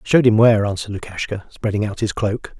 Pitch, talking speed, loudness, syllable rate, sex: 105 Hz, 210 wpm, -19 LUFS, 6.5 syllables/s, male